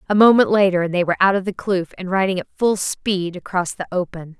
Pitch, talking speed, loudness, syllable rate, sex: 185 Hz, 245 wpm, -19 LUFS, 5.9 syllables/s, female